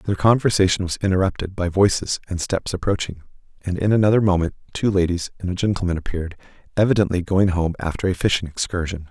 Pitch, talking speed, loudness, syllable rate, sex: 90 Hz, 170 wpm, -21 LUFS, 6.3 syllables/s, male